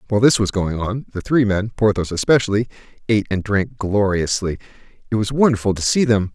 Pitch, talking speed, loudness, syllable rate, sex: 105 Hz, 180 wpm, -19 LUFS, 6.0 syllables/s, male